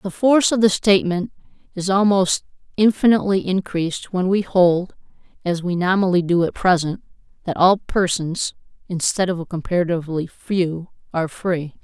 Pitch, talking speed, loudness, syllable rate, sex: 185 Hz, 140 wpm, -19 LUFS, 5.2 syllables/s, female